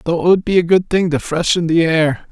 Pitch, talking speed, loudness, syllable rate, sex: 170 Hz, 285 wpm, -15 LUFS, 5.5 syllables/s, male